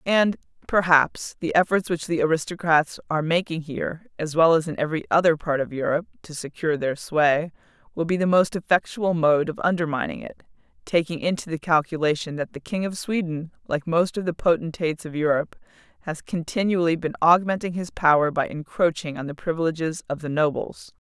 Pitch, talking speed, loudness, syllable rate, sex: 165 Hz, 175 wpm, -23 LUFS, 5.7 syllables/s, female